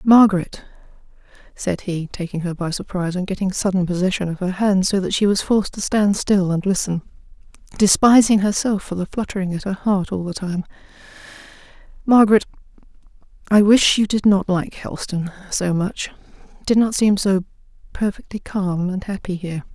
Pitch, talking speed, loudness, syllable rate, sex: 190 Hz, 160 wpm, -19 LUFS, 5.4 syllables/s, female